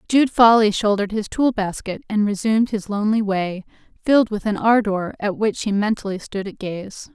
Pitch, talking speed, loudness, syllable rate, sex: 210 Hz, 185 wpm, -20 LUFS, 5.3 syllables/s, female